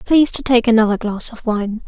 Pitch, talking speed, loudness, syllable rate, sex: 230 Hz, 225 wpm, -16 LUFS, 5.7 syllables/s, female